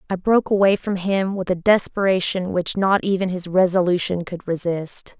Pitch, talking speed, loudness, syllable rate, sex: 185 Hz, 175 wpm, -20 LUFS, 5.0 syllables/s, female